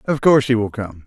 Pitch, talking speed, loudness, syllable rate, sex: 115 Hz, 280 wpm, -17 LUFS, 6.4 syllables/s, male